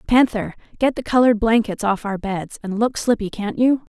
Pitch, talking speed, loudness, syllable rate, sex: 220 Hz, 195 wpm, -20 LUFS, 5.2 syllables/s, female